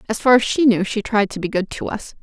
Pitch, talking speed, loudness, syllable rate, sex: 215 Hz, 325 wpm, -18 LUFS, 6.0 syllables/s, female